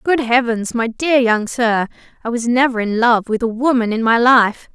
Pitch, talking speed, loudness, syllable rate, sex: 235 Hz, 215 wpm, -16 LUFS, 4.7 syllables/s, female